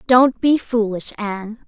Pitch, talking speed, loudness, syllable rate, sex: 225 Hz, 145 wpm, -19 LUFS, 4.2 syllables/s, female